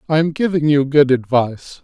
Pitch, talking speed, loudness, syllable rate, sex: 145 Hz, 195 wpm, -16 LUFS, 5.5 syllables/s, male